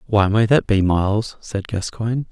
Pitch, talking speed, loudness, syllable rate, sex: 105 Hz, 180 wpm, -19 LUFS, 4.8 syllables/s, male